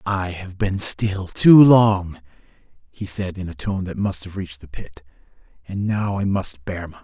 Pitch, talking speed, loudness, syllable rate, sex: 95 Hz, 205 wpm, -20 LUFS, 4.6 syllables/s, male